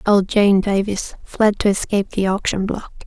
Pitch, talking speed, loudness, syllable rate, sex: 200 Hz, 155 wpm, -18 LUFS, 4.7 syllables/s, female